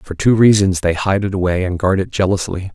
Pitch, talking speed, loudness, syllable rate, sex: 95 Hz, 240 wpm, -16 LUFS, 5.6 syllables/s, male